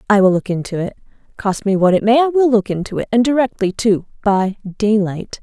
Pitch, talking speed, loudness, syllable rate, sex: 210 Hz, 190 wpm, -16 LUFS, 5.5 syllables/s, female